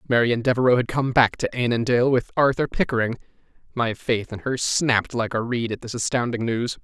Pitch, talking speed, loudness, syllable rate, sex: 120 Hz, 195 wpm, -22 LUFS, 5.7 syllables/s, male